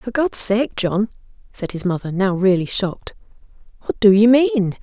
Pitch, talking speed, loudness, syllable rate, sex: 205 Hz, 175 wpm, -18 LUFS, 4.6 syllables/s, female